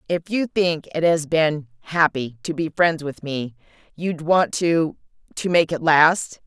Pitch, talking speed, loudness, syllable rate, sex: 160 Hz, 140 wpm, -21 LUFS, 3.9 syllables/s, female